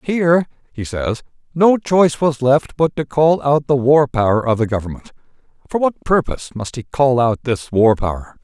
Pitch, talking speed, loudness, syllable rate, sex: 135 Hz, 190 wpm, -16 LUFS, 5.0 syllables/s, male